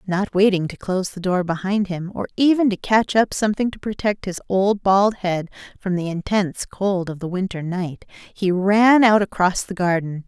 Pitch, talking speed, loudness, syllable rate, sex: 190 Hz, 200 wpm, -20 LUFS, 4.8 syllables/s, female